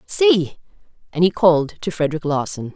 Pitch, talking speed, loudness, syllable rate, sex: 155 Hz, 130 wpm, -18 LUFS, 5.5 syllables/s, female